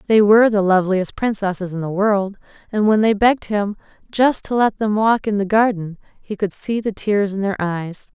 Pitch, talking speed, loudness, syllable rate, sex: 205 Hz, 210 wpm, -18 LUFS, 5.1 syllables/s, female